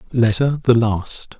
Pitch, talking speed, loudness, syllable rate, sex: 115 Hz, 130 wpm, -17 LUFS, 3.5 syllables/s, male